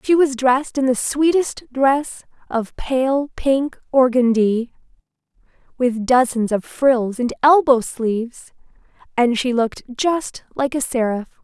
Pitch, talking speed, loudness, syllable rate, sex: 255 Hz, 130 wpm, -18 LUFS, 3.8 syllables/s, female